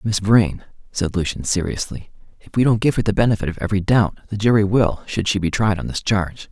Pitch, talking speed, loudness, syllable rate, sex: 100 Hz, 230 wpm, -19 LUFS, 6.0 syllables/s, male